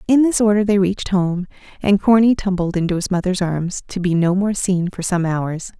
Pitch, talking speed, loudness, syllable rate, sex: 190 Hz, 220 wpm, -18 LUFS, 5.2 syllables/s, female